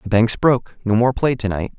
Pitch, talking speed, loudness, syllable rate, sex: 115 Hz, 270 wpm, -18 LUFS, 5.7 syllables/s, male